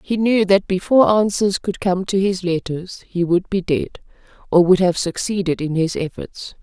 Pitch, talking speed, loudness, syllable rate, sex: 185 Hz, 190 wpm, -18 LUFS, 4.7 syllables/s, female